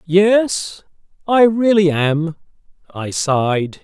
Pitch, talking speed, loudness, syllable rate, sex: 180 Hz, 95 wpm, -16 LUFS, 2.9 syllables/s, male